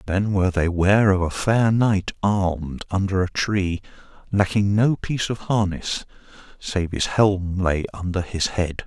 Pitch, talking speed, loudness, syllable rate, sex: 95 Hz, 170 wpm, -22 LUFS, 4.3 syllables/s, male